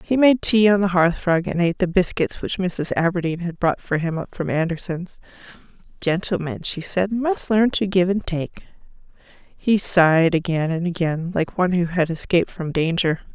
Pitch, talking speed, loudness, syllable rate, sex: 180 Hz, 190 wpm, -20 LUFS, 5.0 syllables/s, female